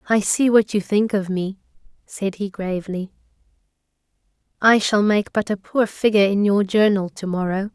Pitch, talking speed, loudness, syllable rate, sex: 200 Hz, 155 wpm, -20 LUFS, 5.0 syllables/s, female